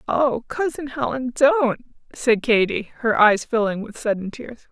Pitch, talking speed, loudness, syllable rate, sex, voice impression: 240 Hz, 155 wpm, -20 LUFS, 4.0 syllables/s, female, feminine, adult-like, slightly muffled, slightly intellectual, slightly calm, unique